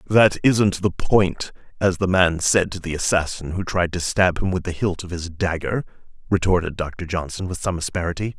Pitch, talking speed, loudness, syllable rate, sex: 90 Hz, 200 wpm, -21 LUFS, 5.1 syllables/s, male